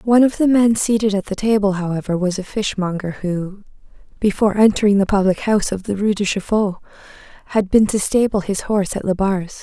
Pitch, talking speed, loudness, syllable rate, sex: 200 Hz, 195 wpm, -18 LUFS, 5.9 syllables/s, female